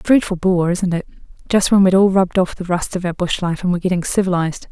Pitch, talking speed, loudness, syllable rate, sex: 180 Hz, 255 wpm, -17 LUFS, 6.3 syllables/s, female